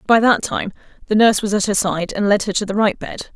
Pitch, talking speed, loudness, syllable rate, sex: 205 Hz, 285 wpm, -17 LUFS, 6.0 syllables/s, female